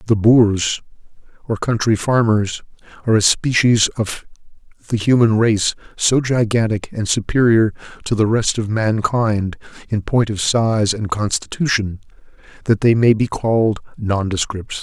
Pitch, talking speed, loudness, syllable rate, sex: 110 Hz, 135 wpm, -17 LUFS, 4.3 syllables/s, male